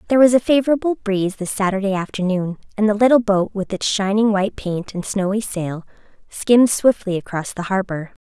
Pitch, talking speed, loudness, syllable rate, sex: 205 Hz, 180 wpm, -19 LUFS, 5.7 syllables/s, female